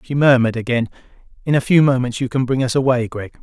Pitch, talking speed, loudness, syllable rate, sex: 125 Hz, 230 wpm, -17 LUFS, 6.5 syllables/s, male